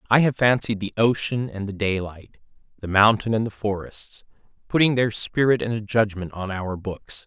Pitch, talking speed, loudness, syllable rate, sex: 105 Hz, 180 wpm, -22 LUFS, 4.9 syllables/s, male